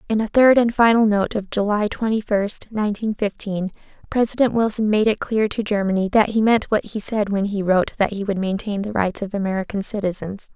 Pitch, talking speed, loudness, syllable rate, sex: 210 Hz, 210 wpm, -20 LUFS, 5.6 syllables/s, female